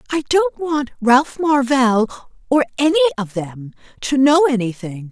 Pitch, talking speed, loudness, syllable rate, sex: 265 Hz, 115 wpm, -17 LUFS, 4.4 syllables/s, female